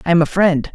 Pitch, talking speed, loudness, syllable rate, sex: 165 Hz, 325 wpm, -15 LUFS, 6.4 syllables/s, male